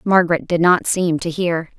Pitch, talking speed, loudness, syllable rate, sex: 175 Hz, 200 wpm, -17 LUFS, 4.9 syllables/s, female